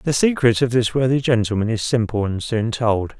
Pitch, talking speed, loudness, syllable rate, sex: 120 Hz, 205 wpm, -19 LUFS, 5.1 syllables/s, male